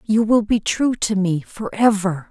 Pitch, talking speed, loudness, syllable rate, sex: 205 Hz, 180 wpm, -19 LUFS, 4.1 syllables/s, female